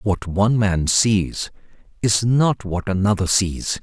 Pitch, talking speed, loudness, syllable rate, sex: 100 Hz, 140 wpm, -19 LUFS, 3.7 syllables/s, male